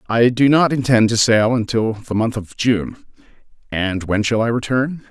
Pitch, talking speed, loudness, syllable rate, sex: 115 Hz, 190 wpm, -17 LUFS, 4.6 syllables/s, male